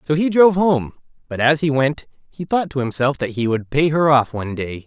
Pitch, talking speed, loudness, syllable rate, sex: 140 Hz, 245 wpm, -18 LUFS, 5.5 syllables/s, male